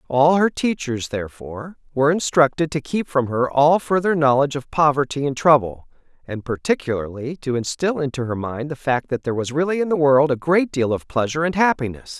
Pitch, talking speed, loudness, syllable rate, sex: 145 Hz, 195 wpm, -20 LUFS, 5.7 syllables/s, male